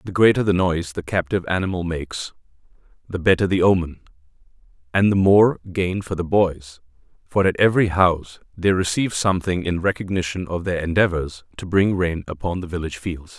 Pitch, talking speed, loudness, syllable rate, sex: 90 Hz, 170 wpm, -20 LUFS, 5.8 syllables/s, male